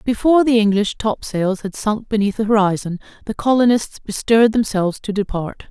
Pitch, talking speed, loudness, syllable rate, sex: 215 Hz, 170 wpm, -18 LUFS, 5.5 syllables/s, female